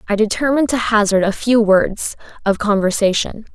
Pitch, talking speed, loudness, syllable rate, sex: 215 Hz, 150 wpm, -16 LUFS, 5.3 syllables/s, female